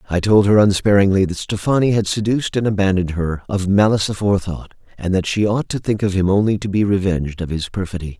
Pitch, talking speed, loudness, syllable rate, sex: 100 Hz, 210 wpm, -18 LUFS, 6.4 syllables/s, male